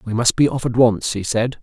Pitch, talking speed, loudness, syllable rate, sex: 115 Hz, 295 wpm, -18 LUFS, 5.4 syllables/s, male